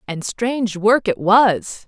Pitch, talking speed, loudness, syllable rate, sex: 210 Hz, 160 wpm, -17 LUFS, 3.5 syllables/s, female